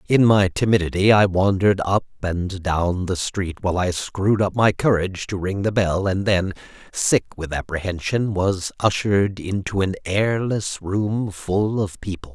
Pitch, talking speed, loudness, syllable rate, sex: 95 Hz, 165 wpm, -21 LUFS, 4.5 syllables/s, male